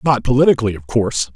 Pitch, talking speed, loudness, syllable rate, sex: 115 Hz, 180 wpm, -16 LUFS, 7.2 syllables/s, male